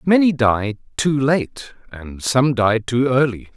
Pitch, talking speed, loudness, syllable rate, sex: 125 Hz, 150 wpm, -18 LUFS, 3.6 syllables/s, male